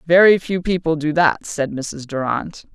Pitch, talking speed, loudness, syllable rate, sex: 160 Hz, 175 wpm, -18 LUFS, 4.2 syllables/s, female